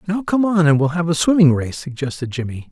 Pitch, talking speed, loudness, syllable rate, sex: 155 Hz, 245 wpm, -17 LUFS, 5.9 syllables/s, male